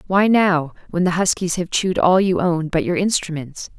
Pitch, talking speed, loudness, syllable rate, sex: 175 Hz, 205 wpm, -18 LUFS, 5.0 syllables/s, female